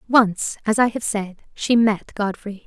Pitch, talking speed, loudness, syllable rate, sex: 215 Hz, 180 wpm, -20 LUFS, 4.0 syllables/s, female